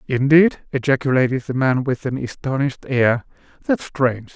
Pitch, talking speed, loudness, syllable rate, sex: 130 Hz, 140 wpm, -19 LUFS, 5.1 syllables/s, male